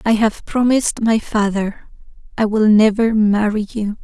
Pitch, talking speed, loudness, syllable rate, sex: 215 Hz, 150 wpm, -16 LUFS, 4.4 syllables/s, female